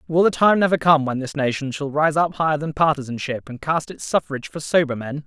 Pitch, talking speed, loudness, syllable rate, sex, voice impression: 150 Hz, 240 wpm, -20 LUFS, 5.9 syllables/s, male, very masculine, slightly young, very adult-like, slightly thick, slightly tensed, slightly powerful, bright, hard, clear, fluent, slightly cool, intellectual, very refreshing, sincere, slightly calm, slightly friendly, slightly reassuring, unique, slightly wild, slightly sweet, lively, slightly intense, slightly sharp, light